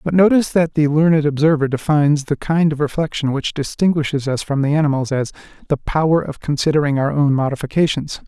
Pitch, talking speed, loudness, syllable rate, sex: 150 Hz, 180 wpm, -17 LUFS, 6.0 syllables/s, male